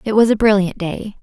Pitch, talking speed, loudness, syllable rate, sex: 205 Hz, 245 wpm, -16 LUFS, 5.6 syllables/s, female